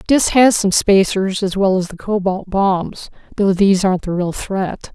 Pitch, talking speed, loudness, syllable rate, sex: 195 Hz, 180 wpm, -16 LUFS, 4.4 syllables/s, female